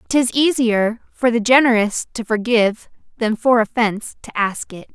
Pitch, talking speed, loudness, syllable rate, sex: 230 Hz, 160 wpm, -17 LUFS, 4.7 syllables/s, female